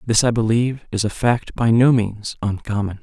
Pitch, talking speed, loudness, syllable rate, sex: 110 Hz, 200 wpm, -19 LUFS, 5.0 syllables/s, male